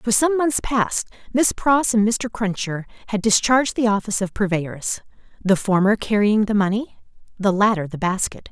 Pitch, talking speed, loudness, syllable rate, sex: 210 Hz, 170 wpm, -20 LUFS, 5.0 syllables/s, female